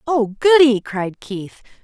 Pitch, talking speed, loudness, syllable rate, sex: 245 Hz, 130 wpm, -16 LUFS, 3.3 syllables/s, female